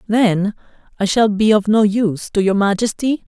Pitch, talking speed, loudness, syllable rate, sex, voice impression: 210 Hz, 180 wpm, -16 LUFS, 4.9 syllables/s, male, very masculine, adult-like, thick, tensed, slightly powerful, dark, hard, muffled, fluent, cool, intellectual, slightly refreshing, sincere, very calm, very mature, very friendly, very reassuring, very unique, elegant, slightly wild, sweet, lively, very kind, modest